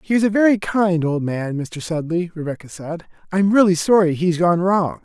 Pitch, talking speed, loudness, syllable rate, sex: 175 Hz, 200 wpm, -18 LUFS, 5.0 syllables/s, male